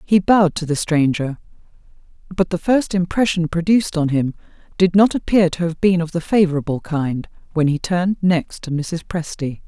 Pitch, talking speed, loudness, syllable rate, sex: 170 Hz, 180 wpm, -18 LUFS, 5.2 syllables/s, female